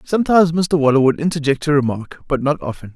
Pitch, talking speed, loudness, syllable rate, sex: 150 Hz, 205 wpm, -17 LUFS, 6.6 syllables/s, male